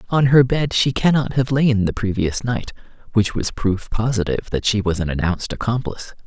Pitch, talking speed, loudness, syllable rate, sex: 110 Hz, 190 wpm, -19 LUFS, 5.5 syllables/s, male